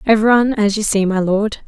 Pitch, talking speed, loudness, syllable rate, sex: 210 Hz, 215 wpm, -15 LUFS, 5.8 syllables/s, female